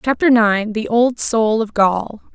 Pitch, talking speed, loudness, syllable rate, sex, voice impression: 225 Hz, 155 wpm, -16 LUFS, 3.7 syllables/s, female, very feminine, slightly young, adult-like, very thin, tensed, powerful, bright, hard, very clear, fluent, very cute, intellectual, very refreshing, sincere, slightly calm, friendly, reassuring, unique, elegant, wild, very sweet, lively, kind, slightly intense